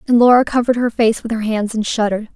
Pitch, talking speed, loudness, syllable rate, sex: 225 Hz, 255 wpm, -16 LUFS, 6.9 syllables/s, female